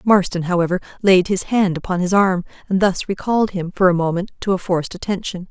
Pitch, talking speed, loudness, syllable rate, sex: 185 Hz, 205 wpm, -19 LUFS, 5.9 syllables/s, female